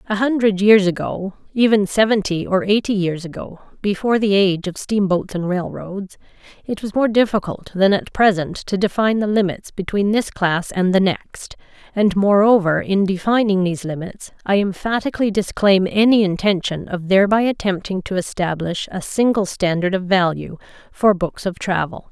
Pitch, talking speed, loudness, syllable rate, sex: 195 Hz, 160 wpm, -18 LUFS, 5.1 syllables/s, female